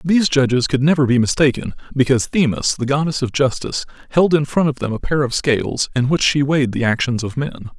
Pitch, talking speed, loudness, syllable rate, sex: 135 Hz, 225 wpm, -17 LUFS, 6.0 syllables/s, male